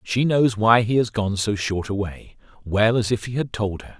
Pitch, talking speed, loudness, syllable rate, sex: 110 Hz, 225 wpm, -21 LUFS, 4.8 syllables/s, male